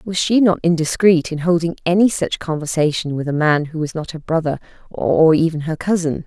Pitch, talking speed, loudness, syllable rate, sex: 165 Hz, 200 wpm, -17 LUFS, 5.4 syllables/s, female